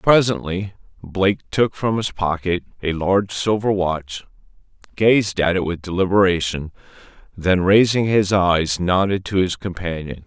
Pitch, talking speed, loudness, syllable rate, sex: 95 Hz, 135 wpm, -19 LUFS, 4.4 syllables/s, male